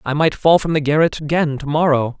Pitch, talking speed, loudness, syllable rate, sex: 150 Hz, 245 wpm, -17 LUFS, 5.7 syllables/s, male